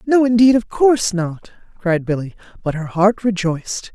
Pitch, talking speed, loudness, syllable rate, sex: 200 Hz, 165 wpm, -17 LUFS, 4.9 syllables/s, female